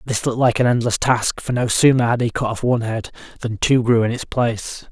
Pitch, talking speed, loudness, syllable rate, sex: 120 Hz, 270 wpm, -18 LUFS, 6.0 syllables/s, male